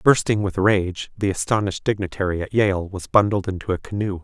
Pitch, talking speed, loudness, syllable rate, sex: 95 Hz, 185 wpm, -21 LUFS, 5.6 syllables/s, male